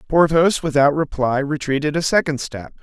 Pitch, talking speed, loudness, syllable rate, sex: 150 Hz, 150 wpm, -18 LUFS, 5.0 syllables/s, male